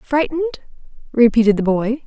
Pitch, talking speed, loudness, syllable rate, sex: 255 Hz, 115 wpm, -17 LUFS, 5.2 syllables/s, female